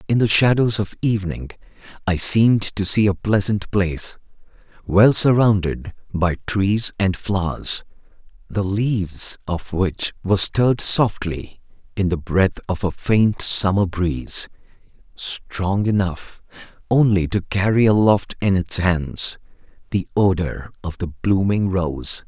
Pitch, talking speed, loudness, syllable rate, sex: 95 Hz, 130 wpm, -19 LUFS, 4.0 syllables/s, male